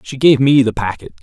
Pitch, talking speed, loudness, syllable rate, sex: 125 Hz, 245 wpm, -14 LUFS, 5.6 syllables/s, male